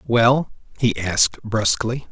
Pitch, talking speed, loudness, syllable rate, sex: 115 Hz, 115 wpm, -19 LUFS, 4.1 syllables/s, male